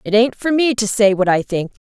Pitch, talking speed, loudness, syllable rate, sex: 215 Hz, 290 wpm, -16 LUFS, 5.5 syllables/s, female